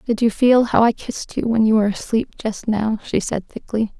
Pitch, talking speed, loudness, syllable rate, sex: 220 Hz, 240 wpm, -19 LUFS, 5.5 syllables/s, female